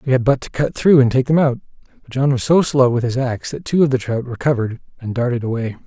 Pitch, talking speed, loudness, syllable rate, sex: 130 Hz, 275 wpm, -17 LUFS, 6.6 syllables/s, male